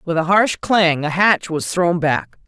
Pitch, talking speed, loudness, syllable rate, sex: 170 Hz, 220 wpm, -17 LUFS, 3.9 syllables/s, female